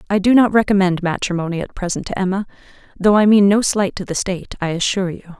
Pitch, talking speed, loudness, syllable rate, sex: 190 Hz, 220 wpm, -17 LUFS, 6.4 syllables/s, female